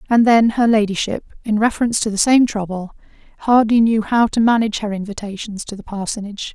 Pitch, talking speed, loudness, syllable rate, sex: 215 Hz, 185 wpm, -17 LUFS, 6.1 syllables/s, female